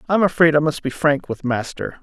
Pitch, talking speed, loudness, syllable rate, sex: 150 Hz, 235 wpm, -19 LUFS, 5.4 syllables/s, male